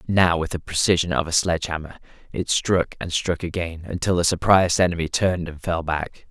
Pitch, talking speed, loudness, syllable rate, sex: 85 Hz, 190 wpm, -22 LUFS, 5.6 syllables/s, male